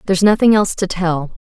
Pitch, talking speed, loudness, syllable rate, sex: 190 Hz, 210 wpm, -15 LUFS, 6.5 syllables/s, female